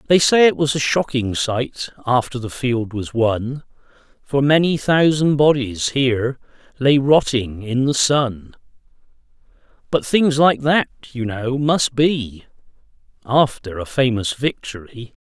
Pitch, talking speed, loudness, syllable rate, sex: 130 Hz, 135 wpm, -18 LUFS, 3.9 syllables/s, male